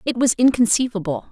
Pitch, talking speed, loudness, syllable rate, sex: 230 Hz, 135 wpm, -18 LUFS, 5.9 syllables/s, female